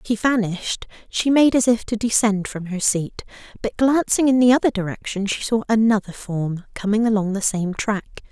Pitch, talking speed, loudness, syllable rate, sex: 215 Hz, 195 wpm, -20 LUFS, 5.1 syllables/s, female